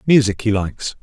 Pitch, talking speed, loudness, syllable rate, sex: 110 Hz, 175 wpm, -18 LUFS, 5.8 syllables/s, male